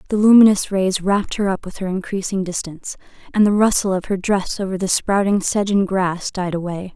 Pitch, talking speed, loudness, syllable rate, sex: 190 Hz, 205 wpm, -18 LUFS, 5.7 syllables/s, female